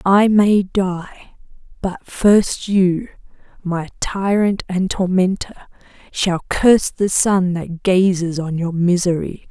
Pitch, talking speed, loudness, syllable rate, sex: 185 Hz, 120 wpm, -17 LUFS, 3.4 syllables/s, female